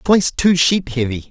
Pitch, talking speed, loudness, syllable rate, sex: 155 Hz, 185 wpm, -16 LUFS, 5.0 syllables/s, male